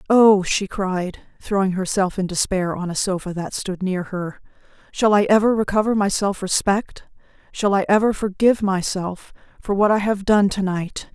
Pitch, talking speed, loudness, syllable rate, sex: 195 Hz, 180 wpm, -20 LUFS, 4.7 syllables/s, female